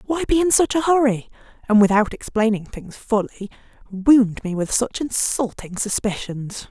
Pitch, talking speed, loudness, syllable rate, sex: 230 Hz, 150 wpm, -20 LUFS, 4.7 syllables/s, female